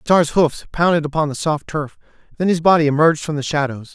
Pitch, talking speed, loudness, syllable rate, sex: 155 Hz, 215 wpm, -18 LUFS, 5.9 syllables/s, male